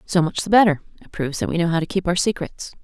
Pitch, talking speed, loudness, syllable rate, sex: 175 Hz, 295 wpm, -20 LUFS, 7.0 syllables/s, female